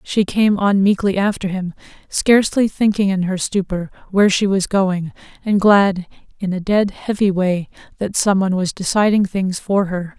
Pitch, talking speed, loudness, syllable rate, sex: 195 Hz, 175 wpm, -17 LUFS, 4.4 syllables/s, female